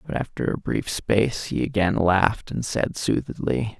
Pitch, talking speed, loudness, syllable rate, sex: 105 Hz, 175 wpm, -24 LUFS, 4.8 syllables/s, male